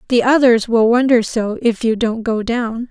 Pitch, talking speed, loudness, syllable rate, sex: 235 Hz, 205 wpm, -15 LUFS, 4.5 syllables/s, female